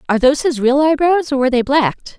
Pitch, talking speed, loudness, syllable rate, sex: 275 Hz, 245 wpm, -15 LUFS, 7.0 syllables/s, female